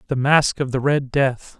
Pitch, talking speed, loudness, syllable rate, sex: 135 Hz, 225 wpm, -19 LUFS, 4.3 syllables/s, male